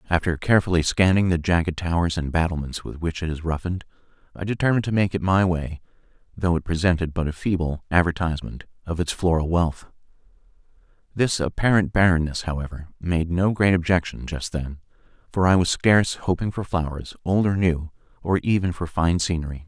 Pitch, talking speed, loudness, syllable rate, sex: 85 Hz, 170 wpm, -23 LUFS, 5.8 syllables/s, male